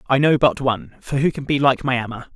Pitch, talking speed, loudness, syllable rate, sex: 130 Hz, 280 wpm, -19 LUFS, 5.9 syllables/s, male